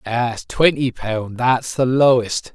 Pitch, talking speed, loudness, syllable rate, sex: 125 Hz, 120 wpm, -18 LUFS, 3.3 syllables/s, male